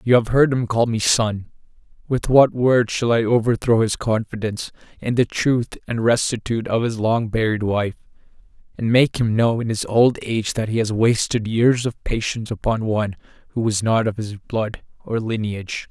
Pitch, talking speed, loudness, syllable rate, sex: 115 Hz, 190 wpm, -20 LUFS, 5.0 syllables/s, male